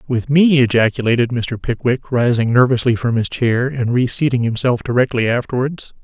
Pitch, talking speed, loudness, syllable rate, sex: 125 Hz, 150 wpm, -16 LUFS, 5.2 syllables/s, male